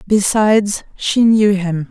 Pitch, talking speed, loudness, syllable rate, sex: 205 Hz, 125 wpm, -14 LUFS, 3.6 syllables/s, female